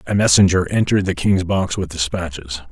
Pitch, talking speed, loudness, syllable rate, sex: 90 Hz, 175 wpm, -17 LUFS, 5.6 syllables/s, male